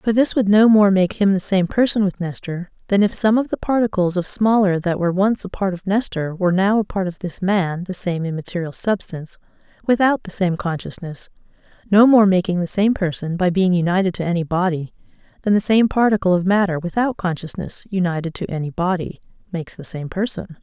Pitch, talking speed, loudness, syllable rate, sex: 190 Hz, 205 wpm, -19 LUFS, 5.7 syllables/s, female